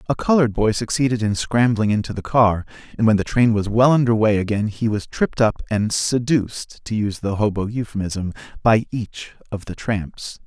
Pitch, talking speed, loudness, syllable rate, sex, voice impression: 110 Hz, 195 wpm, -20 LUFS, 4.6 syllables/s, male, masculine, adult-like, fluent, slightly cool, refreshing, sincere, slightly kind